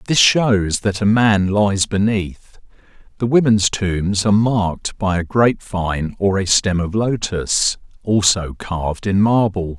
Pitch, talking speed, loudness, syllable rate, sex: 100 Hz, 145 wpm, -17 LUFS, 4.0 syllables/s, male